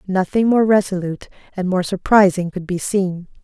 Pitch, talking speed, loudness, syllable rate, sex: 190 Hz, 155 wpm, -18 LUFS, 5.1 syllables/s, female